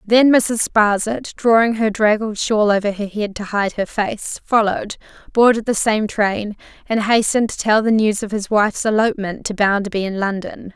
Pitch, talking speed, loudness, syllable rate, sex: 215 Hz, 185 wpm, -17 LUFS, 4.9 syllables/s, female